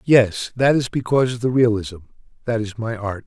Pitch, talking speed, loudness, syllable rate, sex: 115 Hz, 200 wpm, -20 LUFS, 5.3 syllables/s, male